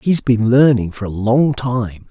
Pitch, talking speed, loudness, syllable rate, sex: 120 Hz, 200 wpm, -15 LUFS, 4.0 syllables/s, male